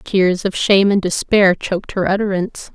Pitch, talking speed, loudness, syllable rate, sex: 190 Hz, 175 wpm, -16 LUFS, 5.2 syllables/s, female